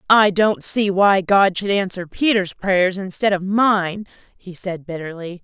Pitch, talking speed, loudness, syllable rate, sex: 190 Hz, 165 wpm, -18 LUFS, 4.0 syllables/s, female